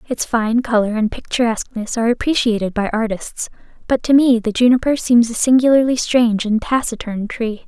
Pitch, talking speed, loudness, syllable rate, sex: 235 Hz, 165 wpm, -17 LUFS, 5.5 syllables/s, female